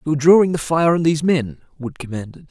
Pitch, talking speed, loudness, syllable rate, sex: 150 Hz, 215 wpm, -16 LUFS, 6.2 syllables/s, male